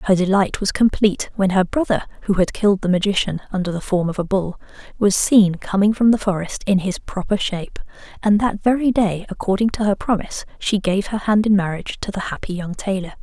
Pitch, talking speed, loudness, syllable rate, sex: 195 Hz, 215 wpm, -19 LUFS, 4.8 syllables/s, female